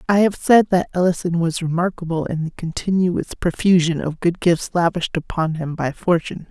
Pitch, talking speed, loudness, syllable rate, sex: 170 Hz, 175 wpm, -19 LUFS, 5.3 syllables/s, female